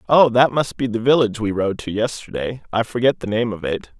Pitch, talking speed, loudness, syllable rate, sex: 115 Hz, 240 wpm, -19 LUFS, 5.7 syllables/s, male